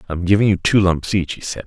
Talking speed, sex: 290 wpm, male